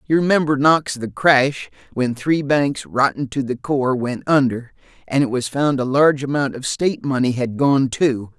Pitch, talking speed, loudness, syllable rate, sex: 135 Hz, 195 wpm, -18 LUFS, 4.5 syllables/s, male